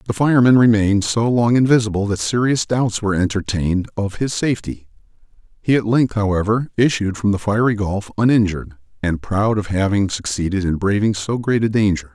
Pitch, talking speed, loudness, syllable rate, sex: 105 Hz, 175 wpm, -18 LUFS, 5.7 syllables/s, male